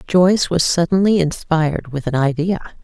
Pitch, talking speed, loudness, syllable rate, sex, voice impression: 165 Hz, 150 wpm, -17 LUFS, 5.2 syllables/s, female, feminine, middle-aged, weak, slightly dark, soft, slightly muffled, halting, intellectual, calm, slightly friendly, reassuring, elegant, lively, kind, modest